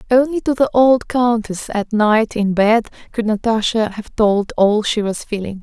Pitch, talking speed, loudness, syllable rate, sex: 220 Hz, 180 wpm, -17 LUFS, 4.3 syllables/s, female